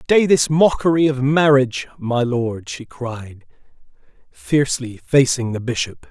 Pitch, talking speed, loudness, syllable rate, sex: 130 Hz, 130 wpm, -18 LUFS, 4.2 syllables/s, male